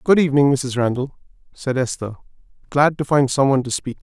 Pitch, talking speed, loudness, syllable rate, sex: 135 Hz, 190 wpm, -19 LUFS, 6.1 syllables/s, male